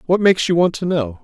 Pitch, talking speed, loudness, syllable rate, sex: 165 Hz, 290 wpm, -17 LUFS, 6.4 syllables/s, male